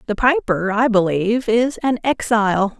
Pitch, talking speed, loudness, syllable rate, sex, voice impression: 220 Hz, 150 wpm, -18 LUFS, 4.7 syllables/s, female, feminine, very adult-like, slightly fluent, sincere, slightly calm, elegant